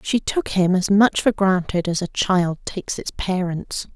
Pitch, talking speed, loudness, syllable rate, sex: 190 Hz, 195 wpm, -20 LUFS, 4.3 syllables/s, female